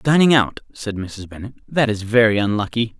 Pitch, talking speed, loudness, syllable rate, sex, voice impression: 115 Hz, 180 wpm, -18 LUFS, 5.1 syllables/s, male, masculine, adult-like, slightly thick, cool, slightly calm, slightly elegant, slightly kind